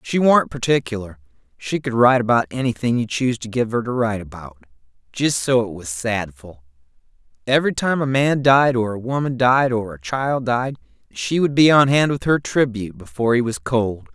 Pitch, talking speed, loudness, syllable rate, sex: 120 Hz, 195 wpm, -19 LUFS, 5.4 syllables/s, male